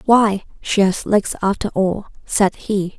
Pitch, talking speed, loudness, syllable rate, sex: 200 Hz, 160 wpm, -18 LUFS, 3.8 syllables/s, female